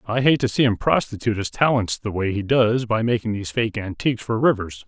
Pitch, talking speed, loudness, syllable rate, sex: 110 Hz, 235 wpm, -21 LUFS, 5.9 syllables/s, male